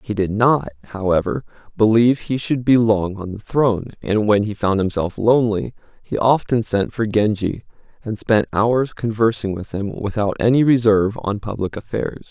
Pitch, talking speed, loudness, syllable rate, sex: 110 Hz, 170 wpm, -19 LUFS, 4.9 syllables/s, male